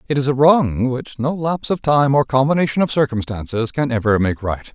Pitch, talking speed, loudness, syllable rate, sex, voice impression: 130 Hz, 215 wpm, -18 LUFS, 5.4 syllables/s, male, very masculine, slightly old, very thick, very tensed, very powerful, bright, very soft, clear, fluent, cool, very intellectual, refreshing, sincere, calm, very friendly, very reassuring, unique, elegant, wild, sweet, very lively, very kind, slightly intense